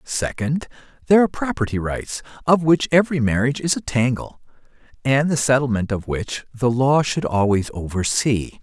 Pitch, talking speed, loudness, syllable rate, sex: 130 Hz, 155 wpm, -20 LUFS, 5.2 syllables/s, male